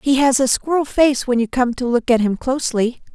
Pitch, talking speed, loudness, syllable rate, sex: 255 Hz, 250 wpm, -17 LUFS, 5.4 syllables/s, female